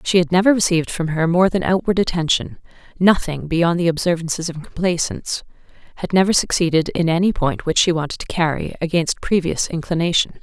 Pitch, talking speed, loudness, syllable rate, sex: 170 Hz, 175 wpm, -18 LUFS, 5.8 syllables/s, female